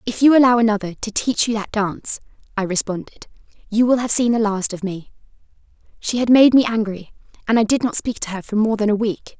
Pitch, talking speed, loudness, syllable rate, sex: 220 Hz, 230 wpm, -18 LUFS, 5.9 syllables/s, female